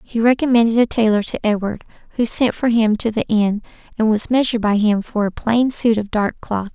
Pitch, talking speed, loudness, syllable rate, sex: 220 Hz, 220 wpm, -18 LUFS, 5.4 syllables/s, female